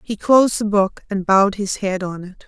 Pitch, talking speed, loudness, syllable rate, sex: 200 Hz, 240 wpm, -18 LUFS, 5.2 syllables/s, female